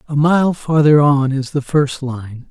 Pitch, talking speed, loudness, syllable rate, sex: 140 Hz, 190 wpm, -15 LUFS, 3.8 syllables/s, male